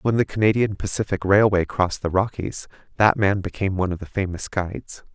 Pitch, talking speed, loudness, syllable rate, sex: 100 Hz, 185 wpm, -22 LUFS, 5.9 syllables/s, male